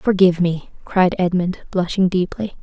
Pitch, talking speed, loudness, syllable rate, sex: 180 Hz, 135 wpm, -18 LUFS, 4.8 syllables/s, female